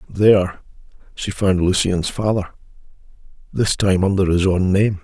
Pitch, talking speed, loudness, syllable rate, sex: 95 Hz, 130 wpm, -18 LUFS, 4.5 syllables/s, male